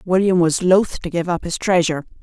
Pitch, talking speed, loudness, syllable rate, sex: 175 Hz, 215 wpm, -18 LUFS, 5.6 syllables/s, female